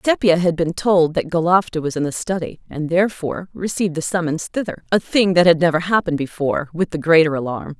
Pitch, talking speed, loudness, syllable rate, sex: 170 Hz, 190 wpm, -18 LUFS, 6.1 syllables/s, female